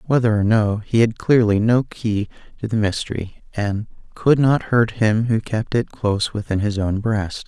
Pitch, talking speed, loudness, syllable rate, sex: 110 Hz, 195 wpm, -19 LUFS, 4.5 syllables/s, male